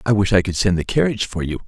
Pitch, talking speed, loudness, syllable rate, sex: 95 Hz, 320 wpm, -19 LUFS, 7.2 syllables/s, male